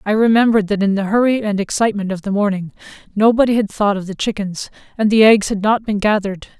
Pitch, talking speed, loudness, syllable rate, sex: 205 Hz, 220 wpm, -16 LUFS, 6.5 syllables/s, female